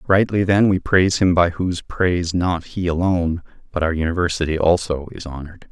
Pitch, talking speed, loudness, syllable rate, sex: 85 Hz, 180 wpm, -19 LUFS, 5.8 syllables/s, male